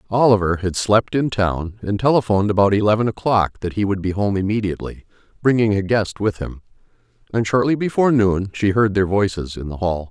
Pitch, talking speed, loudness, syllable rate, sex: 105 Hz, 190 wpm, -19 LUFS, 5.7 syllables/s, male